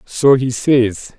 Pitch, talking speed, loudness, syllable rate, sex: 125 Hz, 150 wpm, -14 LUFS, 2.8 syllables/s, male